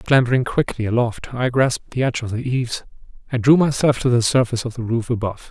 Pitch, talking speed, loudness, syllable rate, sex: 120 Hz, 220 wpm, -20 LUFS, 6.5 syllables/s, male